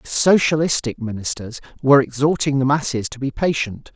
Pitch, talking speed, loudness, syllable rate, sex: 135 Hz, 150 wpm, -19 LUFS, 5.4 syllables/s, male